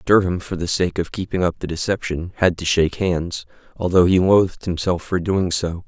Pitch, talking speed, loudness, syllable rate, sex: 90 Hz, 205 wpm, -20 LUFS, 5.2 syllables/s, male